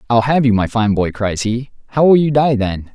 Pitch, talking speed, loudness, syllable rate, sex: 120 Hz, 265 wpm, -15 LUFS, 5.1 syllables/s, male